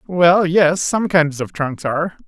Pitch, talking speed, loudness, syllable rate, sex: 165 Hz, 160 wpm, -16 LUFS, 3.9 syllables/s, male